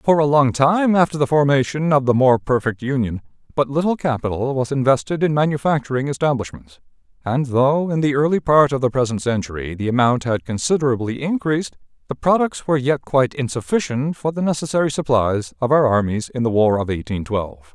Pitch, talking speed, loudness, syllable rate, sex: 135 Hz, 185 wpm, -19 LUFS, 5.8 syllables/s, male